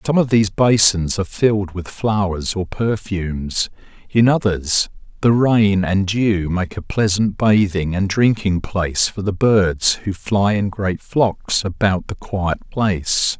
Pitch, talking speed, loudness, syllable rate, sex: 100 Hz, 155 wpm, -18 LUFS, 4.0 syllables/s, male